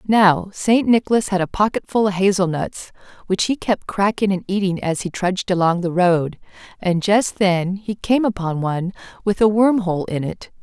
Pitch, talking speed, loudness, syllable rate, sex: 195 Hz, 190 wpm, -19 LUFS, 4.8 syllables/s, female